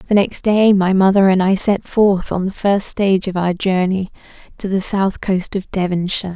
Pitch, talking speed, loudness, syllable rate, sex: 190 Hz, 210 wpm, -16 LUFS, 4.9 syllables/s, female